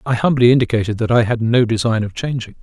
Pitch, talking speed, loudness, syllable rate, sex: 115 Hz, 230 wpm, -16 LUFS, 6.5 syllables/s, male